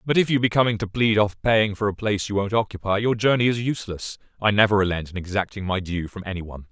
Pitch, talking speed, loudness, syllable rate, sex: 105 Hz, 260 wpm, -22 LUFS, 6.6 syllables/s, male